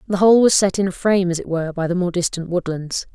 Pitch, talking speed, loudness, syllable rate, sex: 180 Hz, 285 wpm, -18 LUFS, 6.7 syllables/s, female